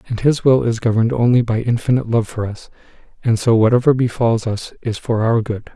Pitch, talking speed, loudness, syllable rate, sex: 115 Hz, 210 wpm, -17 LUFS, 5.9 syllables/s, male